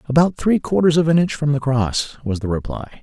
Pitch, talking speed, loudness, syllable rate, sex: 140 Hz, 240 wpm, -18 LUFS, 5.6 syllables/s, male